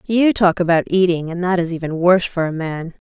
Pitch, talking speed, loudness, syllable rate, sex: 175 Hz, 235 wpm, -17 LUFS, 5.7 syllables/s, female